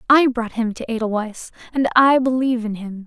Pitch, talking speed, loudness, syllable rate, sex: 235 Hz, 195 wpm, -19 LUFS, 5.5 syllables/s, female